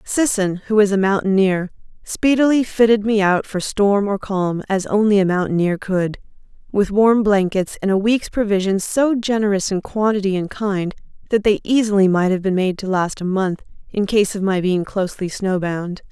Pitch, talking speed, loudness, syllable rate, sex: 200 Hz, 180 wpm, -18 LUFS, 4.9 syllables/s, female